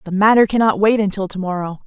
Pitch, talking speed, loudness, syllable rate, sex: 200 Hz, 225 wpm, -16 LUFS, 6.5 syllables/s, female